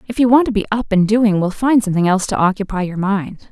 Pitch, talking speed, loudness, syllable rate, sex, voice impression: 205 Hz, 275 wpm, -16 LUFS, 6.4 syllables/s, female, feminine, adult-like, slightly thin, slightly weak, soft, clear, fluent, intellectual, calm, friendly, reassuring, elegant, kind, modest